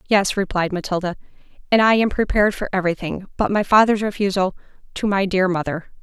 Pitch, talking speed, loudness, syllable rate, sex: 195 Hz, 180 wpm, -19 LUFS, 6.0 syllables/s, female